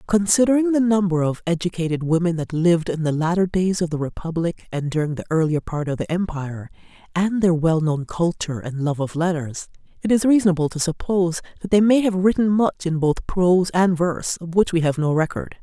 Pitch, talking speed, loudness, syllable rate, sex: 175 Hz, 205 wpm, -21 LUFS, 5.7 syllables/s, female